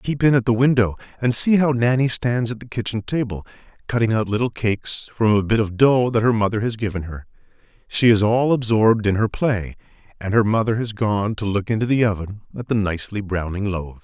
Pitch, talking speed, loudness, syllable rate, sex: 110 Hz, 220 wpm, -20 LUFS, 5.7 syllables/s, male